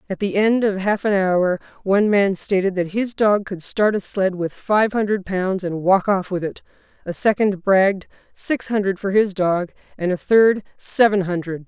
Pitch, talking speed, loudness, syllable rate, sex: 195 Hz, 200 wpm, -19 LUFS, 4.6 syllables/s, female